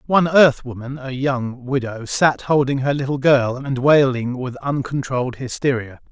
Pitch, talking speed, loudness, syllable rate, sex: 135 Hz, 135 wpm, -19 LUFS, 4.6 syllables/s, male